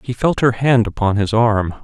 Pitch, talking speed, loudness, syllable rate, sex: 110 Hz, 230 wpm, -16 LUFS, 4.8 syllables/s, male